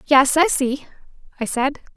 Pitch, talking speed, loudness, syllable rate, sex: 275 Hz, 155 wpm, -19 LUFS, 4.2 syllables/s, female